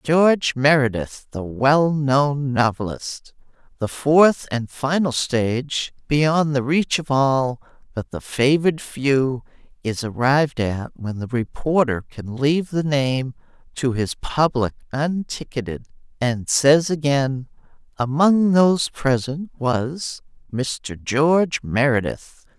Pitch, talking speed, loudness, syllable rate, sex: 140 Hz, 115 wpm, -20 LUFS, 3.6 syllables/s, female